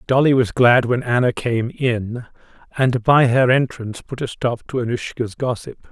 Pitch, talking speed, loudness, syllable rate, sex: 125 Hz, 175 wpm, -19 LUFS, 4.7 syllables/s, male